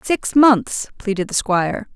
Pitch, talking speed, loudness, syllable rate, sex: 225 Hz, 155 wpm, -18 LUFS, 4.1 syllables/s, female